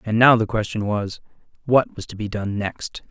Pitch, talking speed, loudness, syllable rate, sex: 110 Hz, 215 wpm, -21 LUFS, 4.8 syllables/s, male